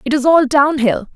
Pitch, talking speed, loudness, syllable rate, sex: 275 Hz, 260 wpm, -13 LUFS, 4.9 syllables/s, female